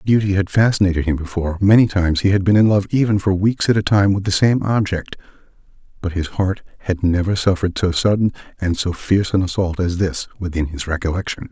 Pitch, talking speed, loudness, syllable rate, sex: 95 Hz, 210 wpm, -18 LUFS, 6.1 syllables/s, male